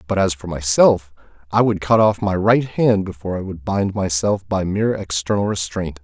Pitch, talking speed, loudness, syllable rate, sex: 95 Hz, 200 wpm, -19 LUFS, 5.1 syllables/s, male